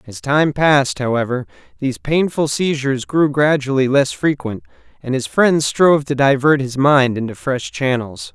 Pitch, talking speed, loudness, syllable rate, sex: 135 Hz, 160 wpm, -16 LUFS, 4.8 syllables/s, male